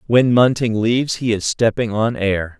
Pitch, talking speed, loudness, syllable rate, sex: 110 Hz, 185 wpm, -17 LUFS, 4.5 syllables/s, male